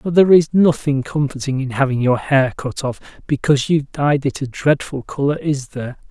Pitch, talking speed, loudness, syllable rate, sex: 140 Hz, 195 wpm, -18 LUFS, 5.5 syllables/s, male